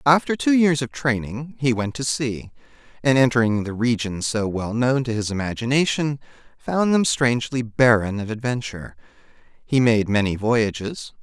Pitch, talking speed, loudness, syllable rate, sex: 120 Hz, 155 wpm, -21 LUFS, 4.8 syllables/s, male